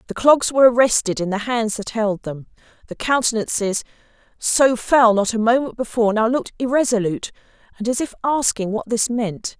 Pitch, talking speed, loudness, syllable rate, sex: 230 Hz, 170 wpm, -19 LUFS, 5.5 syllables/s, female